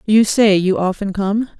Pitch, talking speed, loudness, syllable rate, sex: 205 Hz, 190 wpm, -16 LUFS, 4.4 syllables/s, female